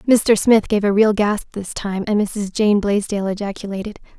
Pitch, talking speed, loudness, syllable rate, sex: 205 Hz, 185 wpm, -18 LUFS, 4.8 syllables/s, female